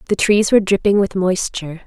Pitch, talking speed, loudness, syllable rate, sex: 195 Hz, 195 wpm, -16 LUFS, 6.1 syllables/s, female